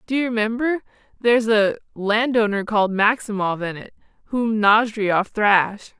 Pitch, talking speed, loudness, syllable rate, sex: 215 Hz, 130 wpm, -20 LUFS, 4.7 syllables/s, female